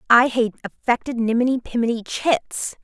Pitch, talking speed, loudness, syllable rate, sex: 240 Hz, 125 wpm, -21 LUFS, 5.3 syllables/s, female